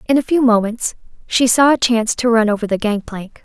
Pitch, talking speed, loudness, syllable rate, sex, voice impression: 230 Hz, 225 wpm, -16 LUFS, 5.8 syllables/s, female, very feminine, young, slightly soft, slightly clear, cute, slightly refreshing, friendly, slightly reassuring